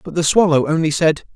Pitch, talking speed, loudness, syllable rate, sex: 160 Hz, 220 wpm, -16 LUFS, 6.1 syllables/s, male